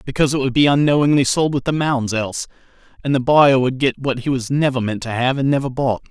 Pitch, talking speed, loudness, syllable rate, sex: 135 Hz, 245 wpm, -17 LUFS, 6.2 syllables/s, male